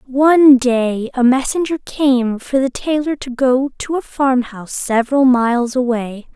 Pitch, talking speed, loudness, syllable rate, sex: 255 Hz, 150 wpm, -15 LUFS, 4.4 syllables/s, female